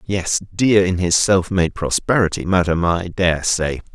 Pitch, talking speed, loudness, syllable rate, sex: 90 Hz, 165 wpm, -18 LUFS, 4.1 syllables/s, male